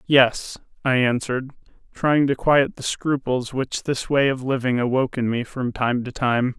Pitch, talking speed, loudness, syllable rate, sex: 130 Hz, 180 wpm, -21 LUFS, 4.6 syllables/s, male